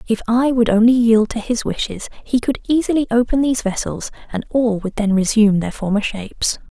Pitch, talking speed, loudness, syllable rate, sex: 225 Hz, 195 wpm, -18 LUFS, 5.5 syllables/s, female